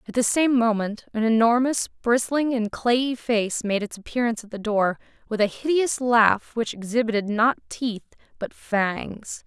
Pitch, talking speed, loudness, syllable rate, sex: 230 Hz, 165 wpm, -23 LUFS, 4.5 syllables/s, female